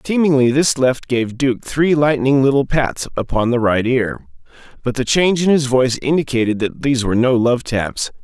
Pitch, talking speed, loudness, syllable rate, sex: 130 Hz, 190 wpm, -16 LUFS, 5.2 syllables/s, male